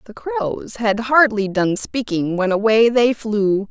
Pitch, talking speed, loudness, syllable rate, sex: 225 Hz, 160 wpm, -18 LUFS, 3.7 syllables/s, female